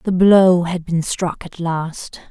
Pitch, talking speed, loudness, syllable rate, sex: 175 Hz, 180 wpm, -17 LUFS, 3.2 syllables/s, female